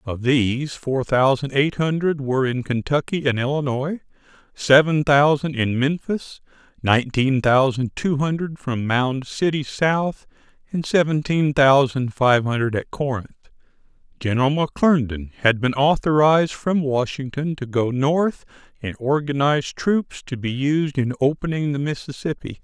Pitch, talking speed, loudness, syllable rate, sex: 140 Hz, 135 wpm, -20 LUFS, 4.5 syllables/s, male